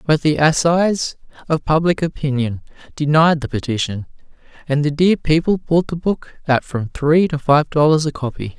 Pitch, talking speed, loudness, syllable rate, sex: 150 Hz, 170 wpm, -17 LUFS, 4.9 syllables/s, male